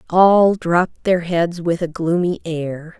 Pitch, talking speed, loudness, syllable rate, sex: 170 Hz, 160 wpm, -18 LUFS, 3.8 syllables/s, female